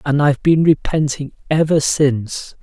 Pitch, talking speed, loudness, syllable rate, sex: 145 Hz, 135 wpm, -16 LUFS, 4.7 syllables/s, male